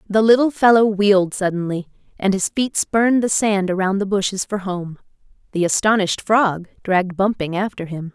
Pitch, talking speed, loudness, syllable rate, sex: 200 Hz, 160 wpm, -18 LUFS, 5.3 syllables/s, female